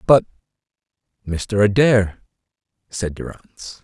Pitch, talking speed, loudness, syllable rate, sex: 100 Hz, 80 wpm, -19 LUFS, 4.0 syllables/s, male